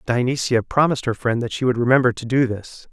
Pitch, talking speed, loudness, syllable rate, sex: 125 Hz, 225 wpm, -20 LUFS, 6.1 syllables/s, male